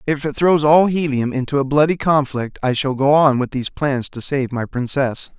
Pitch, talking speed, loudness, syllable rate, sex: 140 Hz, 225 wpm, -18 LUFS, 5.0 syllables/s, male